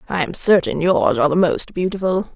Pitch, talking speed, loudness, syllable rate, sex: 175 Hz, 205 wpm, -18 LUFS, 5.6 syllables/s, female